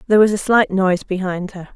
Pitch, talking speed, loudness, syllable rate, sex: 195 Hz, 240 wpm, -17 LUFS, 6.3 syllables/s, female